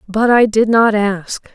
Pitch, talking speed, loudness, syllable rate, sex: 215 Hz, 195 wpm, -13 LUFS, 3.6 syllables/s, female